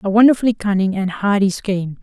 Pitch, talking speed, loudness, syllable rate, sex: 205 Hz, 180 wpm, -17 LUFS, 6.3 syllables/s, female